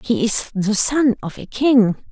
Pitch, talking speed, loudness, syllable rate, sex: 225 Hz, 200 wpm, -17 LUFS, 3.6 syllables/s, female